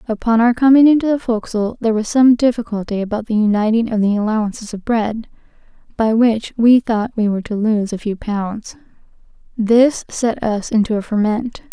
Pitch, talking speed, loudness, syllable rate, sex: 225 Hz, 180 wpm, -16 LUFS, 5.4 syllables/s, female